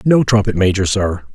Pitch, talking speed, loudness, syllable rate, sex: 105 Hz, 180 wpm, -15 LUFS, 5.2 syllables/s, male